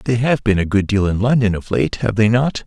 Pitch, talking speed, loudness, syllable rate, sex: 110 Hz, 295 wpm, -17 LUFS, 5.5 syllables/s, male